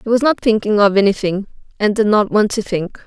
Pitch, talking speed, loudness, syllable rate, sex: 210 Hz, 235 wpm, -16 LUFS, 5.7 syllables/s, female